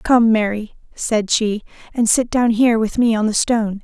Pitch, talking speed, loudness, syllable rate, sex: 225 Hz, 205 wpm, -17 LUFS, 4.8 syllables/s, female